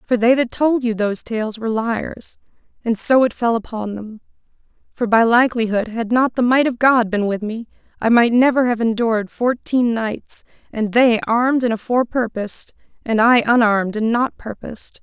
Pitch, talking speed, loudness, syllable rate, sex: 230 Hz, 185 wpm, -18 LUFS, 5.0 syllables/s, female